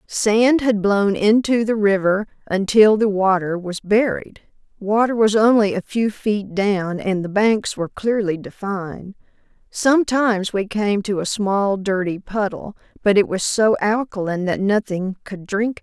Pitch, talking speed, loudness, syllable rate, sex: 205 Hz, 160 wpm, -19 LUFS, 4.3 syllables/s, female